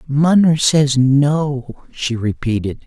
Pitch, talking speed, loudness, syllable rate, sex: 140 Hz, 105 wpm, -15 LUFS, 3.0 syllables/s, male